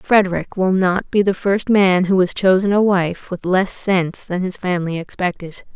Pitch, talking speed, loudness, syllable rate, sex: 190 Hz, 200 wpm, -17 LUFS, 4.8 syllables/s, female